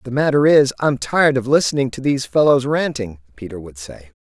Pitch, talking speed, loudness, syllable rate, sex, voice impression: 130 Hz, 200 wpm, -17 LUFS, 5.8 syllables/s, male, masculine, adult-like, slightly fluent, refreshing, slightly sincere